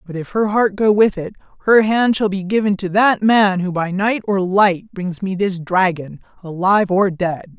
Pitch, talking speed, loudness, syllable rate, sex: 195 Hz, 215 wpm, -17 LUFS, 4.5 syllables/s, female